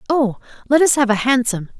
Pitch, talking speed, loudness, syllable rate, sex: 250 Hz, 200 wpm, -16 LUFS, 5.7 syllables/s, female